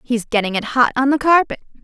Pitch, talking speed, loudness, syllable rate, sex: 255 Hz, 230 wpm, -17 LUFS, 6.1 syllables/s, female